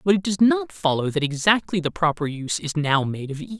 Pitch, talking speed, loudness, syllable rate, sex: 170 Hz, 250 wpm, -22 LUFS, 5.9 syllables/s, male